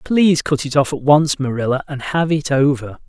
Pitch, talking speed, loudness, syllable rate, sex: 145 Hz, 215 wpm, -17 LUFS, 5.2 syllables/s, male